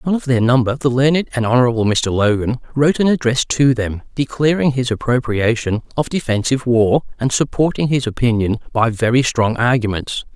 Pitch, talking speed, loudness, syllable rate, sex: 125 Hz, 170 wpm, -17 LUFS, 5.6 syllables/s, male